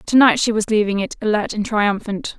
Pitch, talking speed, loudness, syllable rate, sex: 215 Hz, 225 wpm, -18 LUFS, 5.4 syllables/s, female